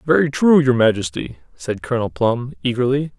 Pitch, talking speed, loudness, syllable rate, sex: 125 Hz, 150 wpm, -18 LUFS, 5.3 syllables/s, male